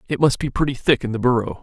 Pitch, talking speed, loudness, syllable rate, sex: 135 Hz, 295 wpm, -20 LUFS, 6.9 syllables/s, male